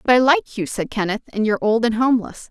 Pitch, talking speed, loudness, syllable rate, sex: 225 Hz, 265 wpm, -19 LUFS, 6.4 syllables/s, female